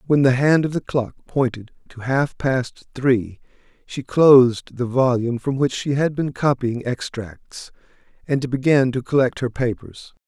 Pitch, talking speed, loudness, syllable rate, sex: 130 Hz, 165 wpm, -20 LUFS, 4.2 syllables/s, male